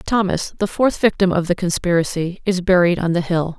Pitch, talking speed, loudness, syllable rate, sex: 180 Hz, 200 wpm, -18 LUFS, 5.4 syllables/s, female